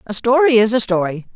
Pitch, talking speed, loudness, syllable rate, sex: 225 Hz, 220 wpm, -15 LUFS, 6.0 syllables/s, female